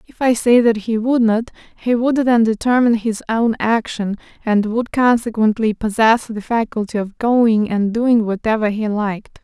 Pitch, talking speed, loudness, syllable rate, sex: 225 Hz, 170 wpm, -17 LUFS, 4.6 syllables/s, female